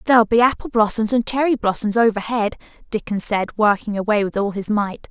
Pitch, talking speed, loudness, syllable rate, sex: 220 Hz, 190 wpm, -19 LUFS, 5.7 syllables/s, female